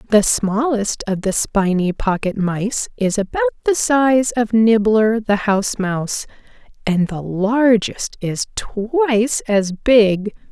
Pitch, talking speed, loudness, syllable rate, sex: 220 Hz, 130 wpm, -17 LUFS, 3.6 syllables/s, female